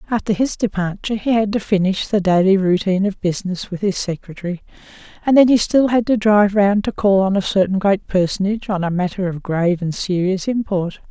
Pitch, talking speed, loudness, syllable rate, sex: 195 Hz, 205 wpm, -18 LUFS, 5.9 syllables/s, female